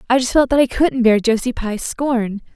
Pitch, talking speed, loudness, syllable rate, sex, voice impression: 245 Hz, 235 wpm, -17 LUFS, 4.9 syllables/s, female, feminine, adult-like, slightly tensed, slightly powerful, soft, clear, intellectual, calm, elegant, slightly sharp